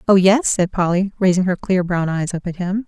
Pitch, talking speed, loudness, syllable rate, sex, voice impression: 185 Hz, 250 wpm, -18 LUFS, 5.3 syllables/s, female, feminine, adult-like, relaxed, slightly weak, soft, muffled, intellectual, calm, reassuring, elegant, kind, modest